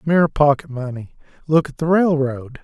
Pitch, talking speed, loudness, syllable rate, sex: 145 Hz, 160 wpm, -18 LUFS, 5.0 syllables/s, male